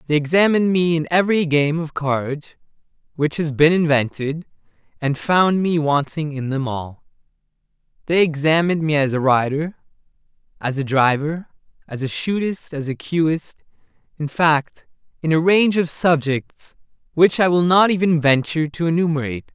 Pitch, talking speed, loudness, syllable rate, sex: 155 Hz, 145 wpm, -19 LUFS, 4.9 syllables/s, male